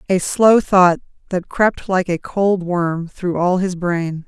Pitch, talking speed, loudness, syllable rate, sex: 180 Hz, 185 wpm, -17 LUFS, 3.5 syllables/s, female